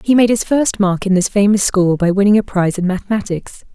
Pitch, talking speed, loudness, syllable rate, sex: 200 Hz, 240 wpm, -15 LUFS, 5.9 syllables/s, female